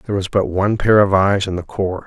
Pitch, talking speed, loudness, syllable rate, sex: 100 Hz, 290 wpm, -17 LUFS, 6.3 syllables/s, male